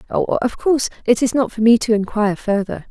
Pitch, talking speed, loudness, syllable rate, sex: 230 Hz, 205 wpm, -17 LUFS, 5.6 syllables/s, female